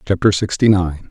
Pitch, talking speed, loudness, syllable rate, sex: 95 Hz, 160 wpm, -16 LUFS, 5.1 syllables/s, male